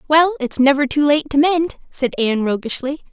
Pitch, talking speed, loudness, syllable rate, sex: 280 Hz, 190 wpm, -17 LUFS, 5.1 syllables/s, female